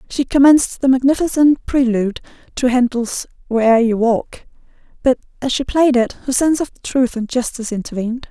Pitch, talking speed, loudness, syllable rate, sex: 250 Hz, 160 wpm, -16 LUFS, 5.7 syllables/s, female